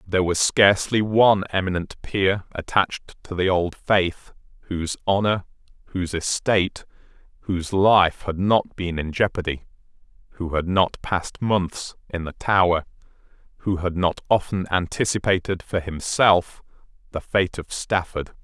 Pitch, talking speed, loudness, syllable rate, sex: 90 Hz, 135 wpm, -22 LUFS, 4.6 syllables/s, male